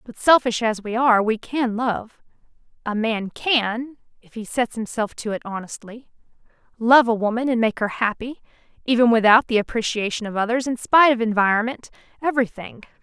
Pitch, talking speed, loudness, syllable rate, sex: 230 Hz, 150 wpm, -20 LUFS, 5.5 syllables/s, female